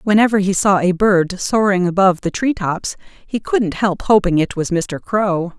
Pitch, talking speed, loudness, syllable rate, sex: 190 Hz, 195 wpm, -16 LUFS, 4.6 syllables/s, female